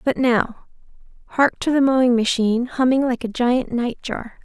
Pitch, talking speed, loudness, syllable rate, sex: 245 Hz, 160 wpm, -19 LUFS, 4.8 syllables/s, female